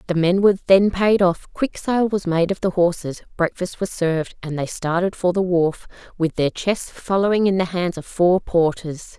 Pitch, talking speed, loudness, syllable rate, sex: 180 Hz, 210 wpm, -20 LUFS, 4.7 syllables/s, female